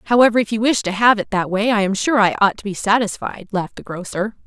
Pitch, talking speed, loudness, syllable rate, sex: 210 Hz, 270 wpm, -18 LUFS, 6.3 syllables/s, female